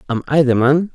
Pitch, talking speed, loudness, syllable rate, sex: 140 Hz, 255 wpm, -15 LUFS, 5.6 syllables/s, male